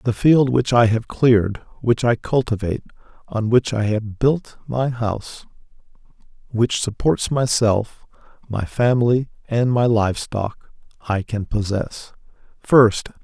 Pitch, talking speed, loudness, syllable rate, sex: 115 Hz, 125 wpm, -19 LUFS, 4.1 syllables/s, male